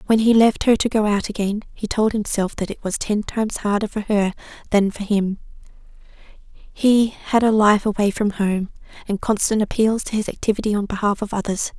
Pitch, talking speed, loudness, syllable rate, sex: 210 Hz, 200 wpm, -20 LUFS, 5.4 syllables/s, female